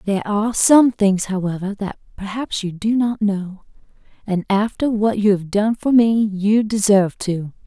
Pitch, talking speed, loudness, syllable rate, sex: 205 Hz, 170 wpm, -18 LUFS, 4.6 syllables/s, female